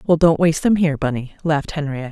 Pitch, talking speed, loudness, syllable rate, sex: 150 Hz, 225 wpm, -18 LUFS, 7.2 syllables/s, female